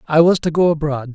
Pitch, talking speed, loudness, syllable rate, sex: 155 Hz, 260 wpm, -16 LUFS, 6.1 syllables/s, male